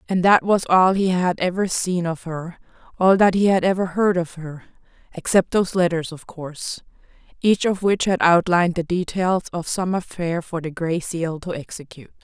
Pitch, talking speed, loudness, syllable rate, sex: 175 Hz, 185 wpm, -20 LUFS, 5.0 syllables/s, female